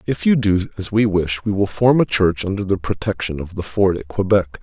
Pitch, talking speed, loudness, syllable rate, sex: 100 Hz, 245 wpm, -19 LUFS, 5.2 syllables/s, male